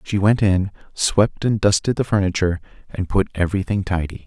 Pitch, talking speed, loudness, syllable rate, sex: 100 Hz, 170 wpm, -20 LUFS, 5.5 syllables/s, male